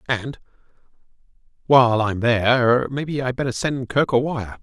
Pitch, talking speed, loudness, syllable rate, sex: 125 Hz, 145 wpm, -20 LUFS, 4.7 syllables/s, male